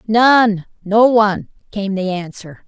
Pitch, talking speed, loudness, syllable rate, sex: 205 Hz, 110 wpm, -15 LUFS, 3.7 syllables/s, female